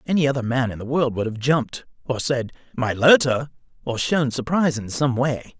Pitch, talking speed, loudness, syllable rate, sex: 130 Hz, 205 wpm, -21 LUFS, 5.4 syllables/s, male